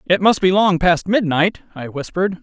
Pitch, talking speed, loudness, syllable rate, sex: 180 Hz, 200 wpm, -17 LUFS, 5.1 syllables/s, male